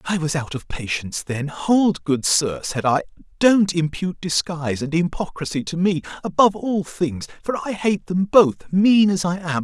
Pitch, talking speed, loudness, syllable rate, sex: 170 Hz, 185 wpm, -20 LUFS, 4.8 syllables/s, male